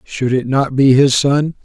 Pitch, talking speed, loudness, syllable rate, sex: 135 Hz, 220 wpm, -13 LUFS, 4.1 syllables/s, male